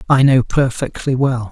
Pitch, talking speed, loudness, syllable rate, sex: 130 Hz, 160 wpm, -16 LUFS, 4.5 syllables/s, male